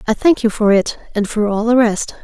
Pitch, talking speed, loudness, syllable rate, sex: 220 Hz, 240 wpm, -15 LUFS, 5.3 syllables/s, female